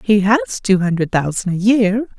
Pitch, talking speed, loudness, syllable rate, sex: 195 Hz, 190 wpm, -16 LUFS, 5.1 syllables/s, female